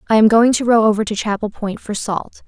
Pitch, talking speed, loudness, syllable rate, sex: 215 Hz, 265 wpm, -16 LUFS, 5.8 syllables/s, female